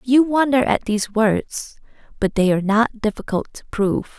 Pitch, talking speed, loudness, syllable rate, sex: 225 Hz, 170 wpm, -19 LUFS, 5.0 syllables/s, female